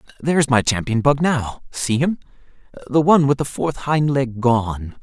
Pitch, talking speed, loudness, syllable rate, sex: 135 Hz, 180 wpm, -19 LUFS, 4.8 syllables/s, male